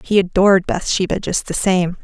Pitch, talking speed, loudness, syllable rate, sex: 185 Hz, 175 wpm, -17 LUFS, 5.2 syllables/s, female